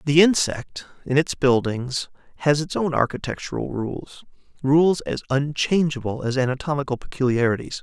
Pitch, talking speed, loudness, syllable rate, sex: 140 Hz, 125 wpm, -22 LUFS, 4.9 syllables/s, male